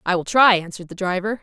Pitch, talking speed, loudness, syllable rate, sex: 190 Hz, 255 wpm, -18 LUFS, 6.8 syllables/s, female